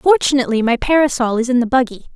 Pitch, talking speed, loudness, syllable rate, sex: 255 Hz, 195 wpm, -16 LUFS, 7.1 syllables/s, female